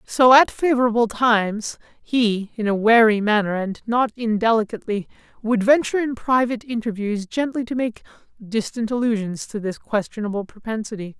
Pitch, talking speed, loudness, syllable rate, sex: 225 Hz, 140 wpm, -20 LUFS, 5.2 syllables/s, male